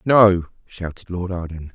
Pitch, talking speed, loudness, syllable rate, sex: 90 Hz, 140 wpm, -20 LUFS, 4.1 syllables/s, male